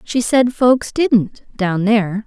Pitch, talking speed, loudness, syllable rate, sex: 225 Hz, 160 wpm, -16 LUFS, 3.4 syllables/s, female